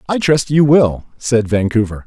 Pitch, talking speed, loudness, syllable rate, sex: 125 Hz, 175 wpm, -14 LUFS, 4.5 syllables/s, male